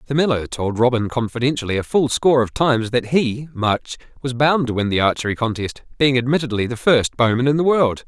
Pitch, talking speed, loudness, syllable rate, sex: 125 Hz, 210 wpm, -19 LUFS, 5.8 syllables/s, male